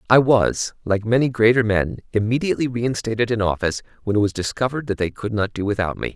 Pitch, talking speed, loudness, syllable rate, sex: 110 Hz, 205 wpm, -21 LUFS, 6.4 syllables/s, male